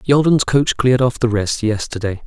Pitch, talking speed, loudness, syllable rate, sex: 120 Hz, 185 wpm, -16 LUFS, 5.0 syllables/s, male